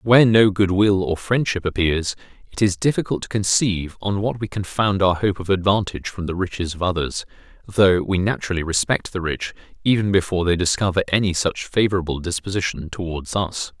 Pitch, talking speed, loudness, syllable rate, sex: 95 Hz, 185 wpm, -20 LUFS, 5.7 syllables/s, male